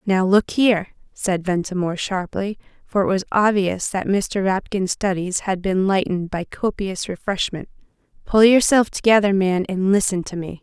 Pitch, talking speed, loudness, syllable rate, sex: 195 Hz, 145 wpm, -20 LUFS, 4.8 syllables/s, female